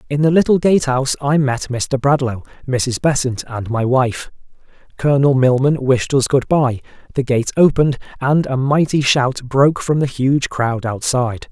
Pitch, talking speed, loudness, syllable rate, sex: 135 Hz, 170 wpm, -16 LUFS, 4.7 syllables/s, male